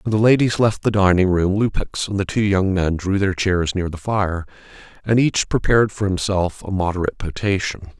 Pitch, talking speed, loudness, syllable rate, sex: 95 Hz, 205 wpm, -19 LUFS, 5.2 syllables/s, male